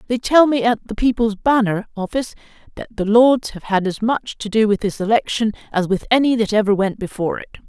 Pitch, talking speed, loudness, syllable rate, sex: 220 Hz, 220 wpm, -18 LUFS, 5.8 syllables/s, female